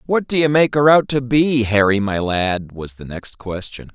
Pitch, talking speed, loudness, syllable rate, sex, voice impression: 120 Hz, 215 wpm, -17 LUFS, 4.3 syllables/s, male, masculine, slightly middle-aged, sincere, calm, slightly mature, elegant